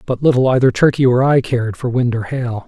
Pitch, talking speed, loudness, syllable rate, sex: 125 Hz, 245 wpm, -15 LUFS, 5.9 syllables/s, male